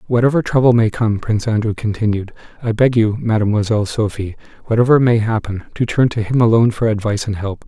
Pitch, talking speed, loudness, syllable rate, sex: 110 Hz, 190 wpm, -16 LUFS, 6.4 syllables/s, male